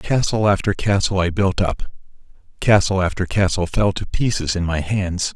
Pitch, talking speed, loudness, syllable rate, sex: 95 Hz, 170 wpm, -19 LUFS, 4.8 syllables/s, male